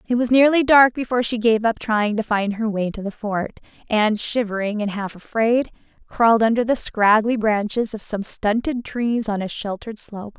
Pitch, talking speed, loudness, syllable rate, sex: 220 Hz, 195 wpm, -20 LUFS, 5.0 syllables/s, female